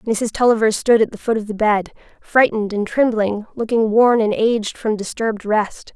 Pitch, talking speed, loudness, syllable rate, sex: 220 Hz, 190 wpm, -18 LUFS, 5.1 syllables/s, female